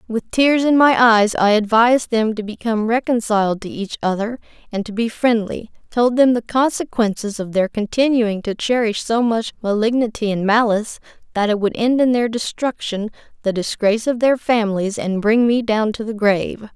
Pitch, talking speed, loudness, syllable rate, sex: 225 Hz, 185 wpm, -18 LUFS, 5.2 syllables/s, female